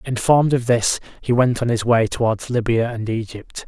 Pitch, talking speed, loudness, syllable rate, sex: 120 Hz, 195 wpm, -19 LUFS, 5.1 syllables/s, male